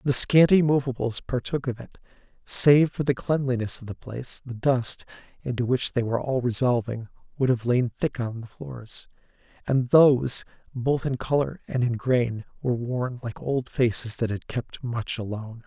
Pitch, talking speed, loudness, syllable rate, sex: 125 Hz, 170 wpm, -24 LUFS, 4.8 syllables/s, male